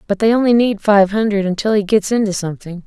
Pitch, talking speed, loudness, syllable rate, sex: 205 Hz, 230 wpm, -15 LUFS, 6.3 syllables/s, female